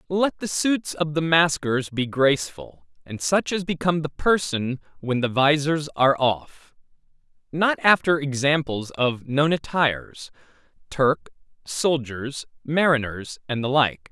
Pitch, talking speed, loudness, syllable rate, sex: 145 Hz, 130 wpm, -22 LUFS, 4.2 syllables/s, male